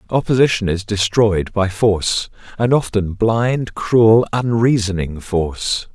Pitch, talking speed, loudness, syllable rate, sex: 105 Hz, 110 wpm, -17 LUFS, 3.9 syllables/s, male